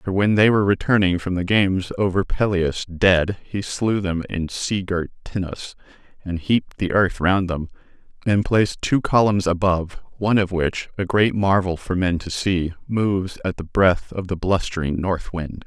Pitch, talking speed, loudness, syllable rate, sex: 95 Hz, 185 wpm, -21 LUFS, 4.7 syllables/s, male